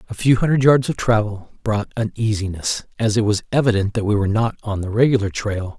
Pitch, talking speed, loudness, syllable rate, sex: 110 Hz, 205 wpm, -19 LUFS, 5.8 syllables/s, male